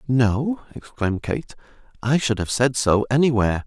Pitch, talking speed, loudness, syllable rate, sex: 125 Hz, 145 wpm, -21 LUFS, 4.9 syllables/s, male